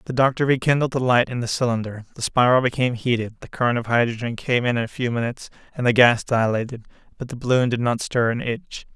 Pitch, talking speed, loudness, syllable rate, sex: 120 Hz, 220 wpm, -21 LUFS, 6.3 syllables/s, male